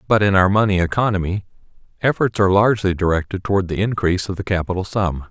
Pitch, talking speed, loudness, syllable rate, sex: 95 Hz, 180 wpm, -18 LUFS, 6.8 syllables/s, male